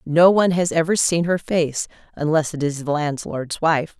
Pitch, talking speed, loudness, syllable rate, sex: 160 Hz, 195 wpm, -20 LUFS, 4.7 syllables/s, female